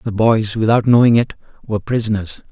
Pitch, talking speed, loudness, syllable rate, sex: 110 Hz, 165 wpm, -16 LUFS, 5.7 syllables/s, male